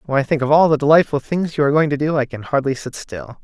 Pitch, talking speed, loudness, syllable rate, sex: 145 Hz, 315 wpm, -17 LUFS, 6.8 syllables/s, male